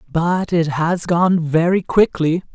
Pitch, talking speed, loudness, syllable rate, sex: 170 Hz, 140 wpm, -17 LUFS, 3.5 syllables/s, male